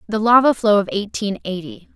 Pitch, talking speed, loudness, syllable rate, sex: 210 Hz, 185 wpm, -17 LUFS, 5.6 syllables/s, female